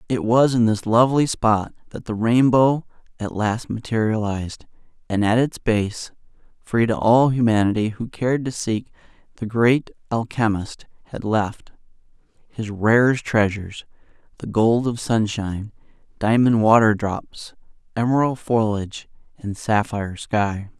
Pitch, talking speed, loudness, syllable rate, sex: 110 Hz, 125 wpm, -20 LUFS, 4.4 syllables/s, male